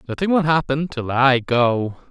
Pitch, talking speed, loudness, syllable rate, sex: 135 Hz, 170 wpm, -19 LUFS, 4.3 syllables/s, male